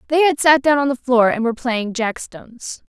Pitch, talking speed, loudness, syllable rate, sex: 255 Hz, 245 wpm, -17 LUFS, 5.2 syllables/s, female